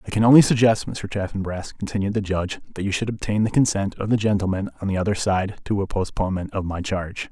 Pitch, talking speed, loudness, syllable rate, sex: 100 Hz, 230 wpm, -22 LUFS, 6.5 syllables/s, male